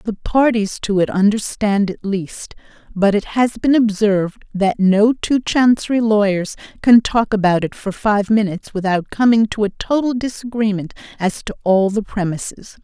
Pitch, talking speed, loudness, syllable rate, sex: 210 Hz, 165 wpm, -17 LUFS, 4.7 syllables/s, female